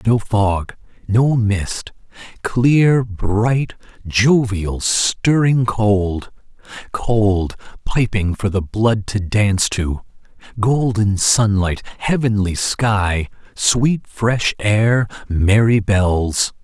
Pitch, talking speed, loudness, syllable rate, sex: 105 Hz, 95 wpm, -17 LUFS, 2.6 syllables/s, male